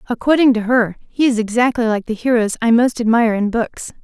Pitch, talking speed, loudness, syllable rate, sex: 230 Hz, 210 wpm, -16 LUFS, 5.7 syllables/s, female